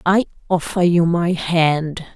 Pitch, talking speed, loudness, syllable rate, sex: 170 Hz, 140 wpm, -18 LUFS, 3.5 syllables/s, female